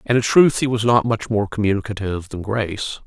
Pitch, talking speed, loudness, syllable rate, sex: 110 Hz, 215 wpm, -19 LUFS, 5.8 syllables/s, male